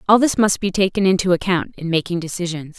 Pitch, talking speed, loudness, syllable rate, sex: 180 Hz, 215 wpm, -19 LUFS, 6.2 syllables/s, female